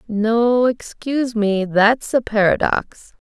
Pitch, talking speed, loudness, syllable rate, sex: 225 Hz, 110 wpm, -18 LUFS, 3.3 syllables/s, female